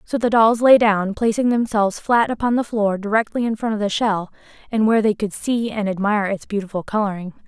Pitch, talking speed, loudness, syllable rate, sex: 215 Hz, 215 wpm, -19 LUFS, 5.8 syllables/s, female